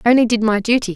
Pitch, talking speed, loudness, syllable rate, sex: 225 Hz, 250 wpm, -16 LUFS, 7.2 syllables/s, female